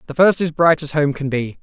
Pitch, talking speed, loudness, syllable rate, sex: 150 Hz, 295 wpm, -17 LUFS, 5.6 syllables/s, male